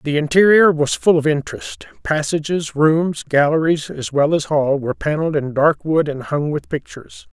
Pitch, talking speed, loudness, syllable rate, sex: 155 Hz, 170 wpm, -17 LUFS, 5.0 syllables/s, male